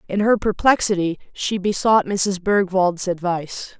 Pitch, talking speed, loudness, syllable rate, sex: 190 Hz, 125 wpm, -19 LUFS, 4.4 syllables/s, female